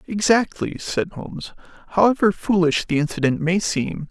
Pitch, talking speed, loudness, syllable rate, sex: 180 Hz, 130 wpm, -20 LUFS, 4.8 syllables/s, male